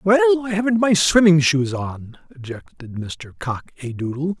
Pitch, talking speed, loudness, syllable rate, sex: 160 Hz, 165 wpm, -18 LUFS, 4.6 syllables/s, male